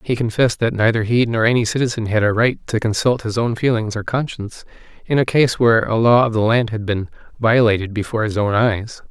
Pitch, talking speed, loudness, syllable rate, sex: 115 Hz, 225 wpm, -17 LUFS, 5.9 syllables/s, male